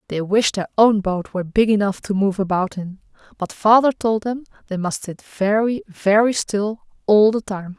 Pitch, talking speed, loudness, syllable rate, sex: 205 Hz, 195 wpm, -19 LUFS, 4.7 syllables/s, female